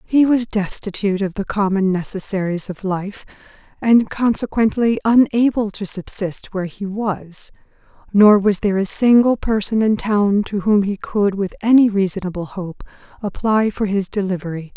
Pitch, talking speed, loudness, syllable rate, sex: 205 Hz, 150 wpm, -18 LUFS, 4.8 syllables/s, female